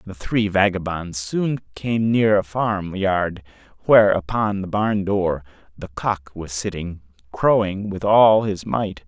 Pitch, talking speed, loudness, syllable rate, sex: 100 Hz, 145 wpm, -20 LUFS, 3.8 syllables/s, male